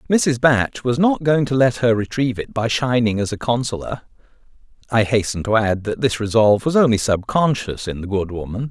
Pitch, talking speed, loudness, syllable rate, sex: 115 Hz, 205 wpm, -19 LUFS, 5.4 syllables/s, male